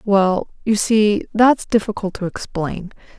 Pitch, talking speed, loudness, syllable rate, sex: 205 Hz, 130 wpm, -18 LUFS, 3.8 syllables/s, female